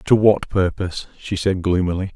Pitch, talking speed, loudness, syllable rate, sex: 95 Hz, 165 wpm, -20 LUFS, 5.0 syllables/s, male